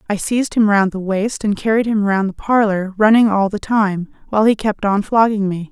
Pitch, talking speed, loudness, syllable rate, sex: 205 Hz, 230 wpm, -16 LUFS, 5.3 syllables/s, female